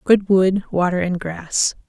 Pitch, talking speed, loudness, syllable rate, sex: 185 Hz, 160 wpm, -19 LUFS, 3.7 syllables/s, female